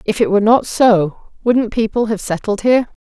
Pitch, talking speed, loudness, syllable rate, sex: 215 Hz, 195 wpm, -15 LUFS, 5.1 syllables/s, female